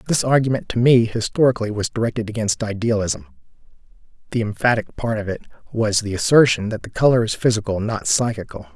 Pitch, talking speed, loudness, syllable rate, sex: 115 Hz, 165 wpm, -19 LUFS, 6.2 syllables/s, male